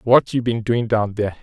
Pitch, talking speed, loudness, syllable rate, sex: 115 Hz, 250 wpm, -19 LUFS, 5.4 syllables/s, male